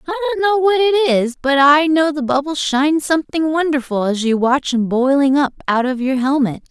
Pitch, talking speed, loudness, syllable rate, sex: 290 Hz, 215 wpm, -16 LUFS, 5.1 syllables/s, female